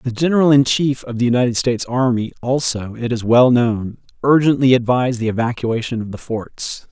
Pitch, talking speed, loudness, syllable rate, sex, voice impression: 125 Hz, 180 wpm, -17 LUFS, 5.4 syllables/s, male, masculine, adult-like, tensed, powerful, slightly muffled, raspy, intellectual, mature, friendly, wild, lively, slightly strict